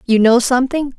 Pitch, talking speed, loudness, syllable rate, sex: 250 Hz, 185 wpm, -14 LUFS, 5.7 syllables/s, female